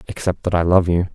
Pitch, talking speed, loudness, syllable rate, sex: 90 Hz, 260 wpm, -18 LUFS, 6.3 syllables/s, male